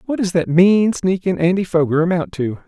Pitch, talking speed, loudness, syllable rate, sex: 175 Hz, 200 wpm, -17 LUFS, 5.2 syllables/s, male